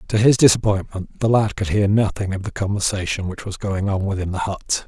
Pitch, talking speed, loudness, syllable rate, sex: 100 Hz, 220 wpm, -20 LUFS, 5.5 syllables/s, male